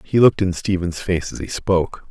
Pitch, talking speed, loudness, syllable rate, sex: 90 Hz, 230 wpm, -20 LUFS, 5.5 syllables/s, male